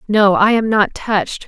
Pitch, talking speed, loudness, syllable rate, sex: 205 Hz, 205 wpm, -15 LUFS, 4.6 syllables/s, female